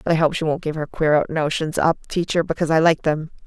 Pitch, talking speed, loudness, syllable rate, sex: 160 Hz, 260 wpm, -20 LUFS, 6.1 syllables/s, female